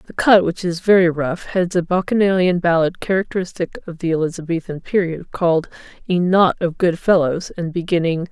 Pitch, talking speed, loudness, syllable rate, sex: 175 Hz, 165 wpm, -18 LUFS, 5.5 syllables/s, female